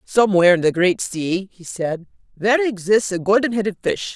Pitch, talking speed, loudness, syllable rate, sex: 195 Hz, 190 wpm, -19 LUFS, 5.4 syllables/s, female